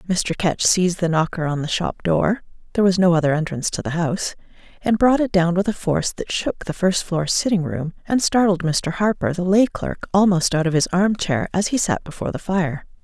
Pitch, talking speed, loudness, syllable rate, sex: 180 Hz, 215 wpm, -20 LUFS, 5.5 syllables/s, female